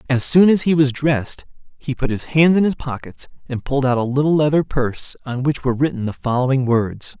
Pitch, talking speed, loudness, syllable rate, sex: 135 Hz, 225 wpm, -18 LUFS, 5.8 syllables/s, male